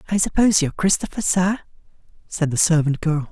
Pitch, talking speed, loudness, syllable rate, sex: 170 Hz, 165 wpm, -19 LUFS, 6.1 syllables/s, male